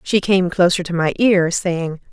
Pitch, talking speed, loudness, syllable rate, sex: 180 Hz, 200 wpm, -17 LUFS, 4.3 syllables/s, female